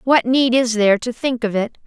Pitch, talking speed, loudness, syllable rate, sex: 240 Hz, 260 wpm, -17 LUFS, 5.3 syllables/s, female